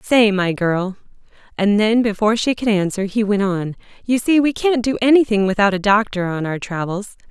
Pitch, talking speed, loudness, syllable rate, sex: 210 Hz, 195 wpm, -18 LUFS, 5.2 syllables/s, female